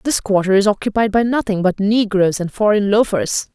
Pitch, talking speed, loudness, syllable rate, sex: 205 Hz, 185 wpm, -16 LUFS, 5.3 syllables/s, female